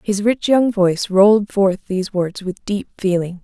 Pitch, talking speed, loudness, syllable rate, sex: 200 Hz, 190 wpm, -17 LUFS, 4.8 syllables/s, female